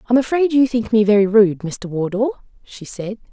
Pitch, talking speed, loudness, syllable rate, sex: 215 Hz, 215 wpm, -17 LUFS, 5.4 syllables/s, female